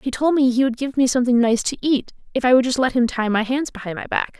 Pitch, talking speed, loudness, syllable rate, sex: 250 Hz, 315 wpm, -19 LUFS, 6.5 syllables/s, female